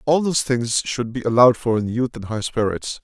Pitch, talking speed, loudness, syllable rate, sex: 120 Hz, 235 wpm, -20 LUFS, 5.6 syllables/s, male